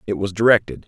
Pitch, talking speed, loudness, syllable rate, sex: 105 Hz, 205 wpm, -18 LUFS, 6.9 syllables/s, male